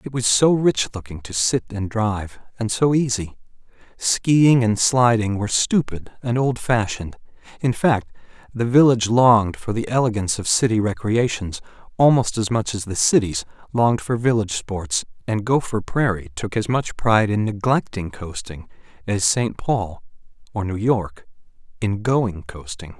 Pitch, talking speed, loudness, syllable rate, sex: 110 Hz, 145 wpm, -20 LUFS, 4.8 syllables/s, male